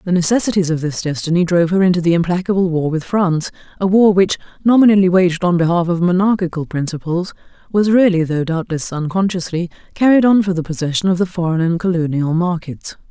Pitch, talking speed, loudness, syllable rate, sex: 175 Hz, 180 wpm, -16 LUFS, 6.1 syllables/s, female